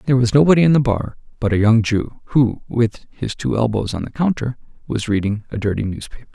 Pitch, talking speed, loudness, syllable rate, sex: 115 Hz, 220 wpm, -18 LUFS, 5.8 syllables/s, male